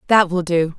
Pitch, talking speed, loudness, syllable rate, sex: 180 Hz, 230 wpm, -17 LUFS, 4.9 syllables/s, female